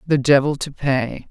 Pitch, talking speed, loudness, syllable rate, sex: 140 Hz, 185 wpm, -18 LUFS, 4.2 syllables/s, female